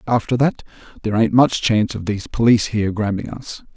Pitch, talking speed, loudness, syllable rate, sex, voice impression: 110 Hz, 190 wpm, -18 LUFS, 6.4 syllables/s, male, masculine, middle-aged, tensed, slightly dark, slightly raspy, sincere, calm, mature, wild, kind, modest